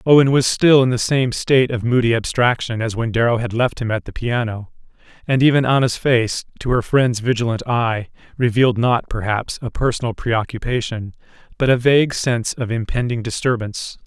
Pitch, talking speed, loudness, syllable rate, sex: 120 Hz, 175 wpm, -18 LUFS, 5.4 syllables/s, male